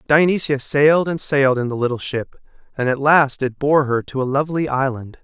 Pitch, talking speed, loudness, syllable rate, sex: 140 Hz, 205 wpm, -18 LUFS, 5.5 syllables/s, male